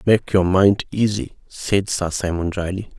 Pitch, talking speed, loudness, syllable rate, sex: 95 Hz, 160 wpm, -20 LUFS, 4.1 syllables/s, male